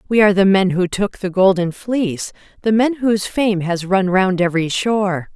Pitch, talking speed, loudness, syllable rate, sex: 195 Hz, 200 wpm, -17 LUFS, 5.2 syllables/s, female